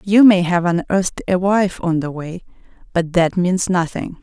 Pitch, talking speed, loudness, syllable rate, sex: 180 Hz, 185 wpm, -17 LUFS, 4.5 syllables/s, female